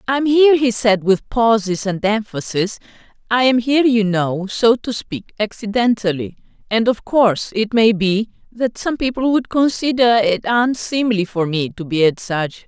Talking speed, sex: 185 wpm, female